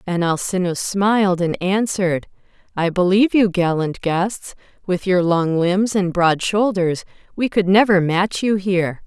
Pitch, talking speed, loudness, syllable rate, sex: 185 Hz, 150 wpm, -18 LUFS, 4.3 syllables/s, female